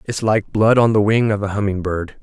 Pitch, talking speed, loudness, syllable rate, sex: 105 Hz, 270 wpm, -17 LUFS, 5.2 syllables/s, male